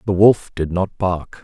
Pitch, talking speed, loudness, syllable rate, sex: 95 Hz, 210 wpm, -18 LUFS, 3.9 syllables/s, male